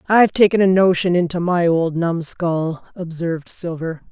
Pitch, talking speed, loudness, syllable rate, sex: 175 Hz, 145 wpm, -18 LUFS, 4.8 syllables/s, female